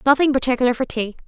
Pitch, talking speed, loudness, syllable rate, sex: 255 Hz, 190 wpm, -19 LUFS, 7.5 syllables/s, female